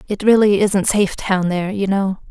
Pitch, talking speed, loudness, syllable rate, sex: 195 Hz, 210 wpm, -16 LUFS, 5.9 syllables/s, female